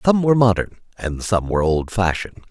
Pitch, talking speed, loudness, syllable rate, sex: 100 Hz, 170 wpm, -19 LUFS, 6.0 syllables/s, male